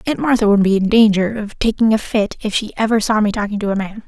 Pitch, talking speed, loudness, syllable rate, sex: 215 Hz, 280 wpm, -16 LUFS, 6.3 syllables/s, female